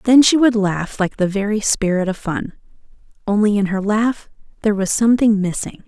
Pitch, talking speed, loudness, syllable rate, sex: 210 Hz, 185 wpm, -17 LUFS, 5.3 syllables/s, female